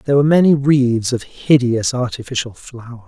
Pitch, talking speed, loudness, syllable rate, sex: 125 Hz, 155 wpm, -16 LUFS, 5.3 syllables/s, male